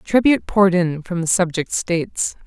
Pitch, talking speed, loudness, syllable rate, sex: 180 Hz, 170 wpm, -18 LUFS, 5.2 syllables/s, female